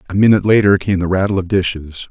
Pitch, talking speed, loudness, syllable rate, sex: 95 Hz, 230 wpm, -14 LUFS, 6.9 syllables/s, male